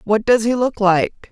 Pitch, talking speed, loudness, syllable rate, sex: 215 Hz, 230 wpm, -16 LUFS, 4.1 syllables/s, female